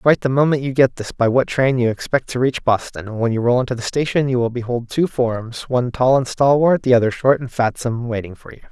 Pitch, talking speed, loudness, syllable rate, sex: 125 Hz, 260 wpm, -18 LUFS, 6.0 syllables/s, male